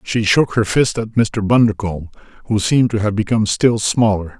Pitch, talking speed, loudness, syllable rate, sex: 110 Hz, 190 wpm, -16 LUFS, 5.4 syllables/s, male